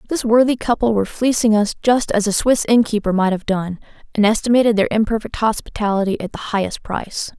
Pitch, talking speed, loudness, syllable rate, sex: 215 Hz, 185 wpm, -18 LUFS, 6.0 syllables/s, female